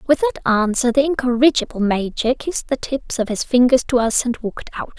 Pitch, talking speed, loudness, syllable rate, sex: 250 Hz, 205 wpm, -18 LUFS, 5.8 syllables/s, female